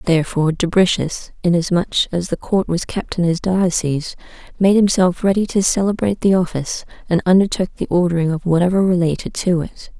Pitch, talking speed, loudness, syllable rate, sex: 180 Hz, 160 wpm, -17 LUFS, 5.8 syllables/s, female